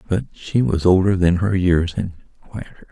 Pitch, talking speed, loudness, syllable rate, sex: 90 Hz, 185 wpm, -18 LUFS, 4.8 syllables/s, male